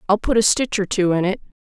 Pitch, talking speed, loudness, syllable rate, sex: 200 Hz, 295 wpm, -19 LUFS, 6.4 syllables/s, female